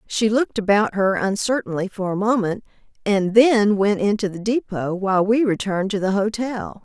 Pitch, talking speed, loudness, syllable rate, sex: 205 Hz, 175 wpm, -20 LUFS, 5.1 syllables/s, female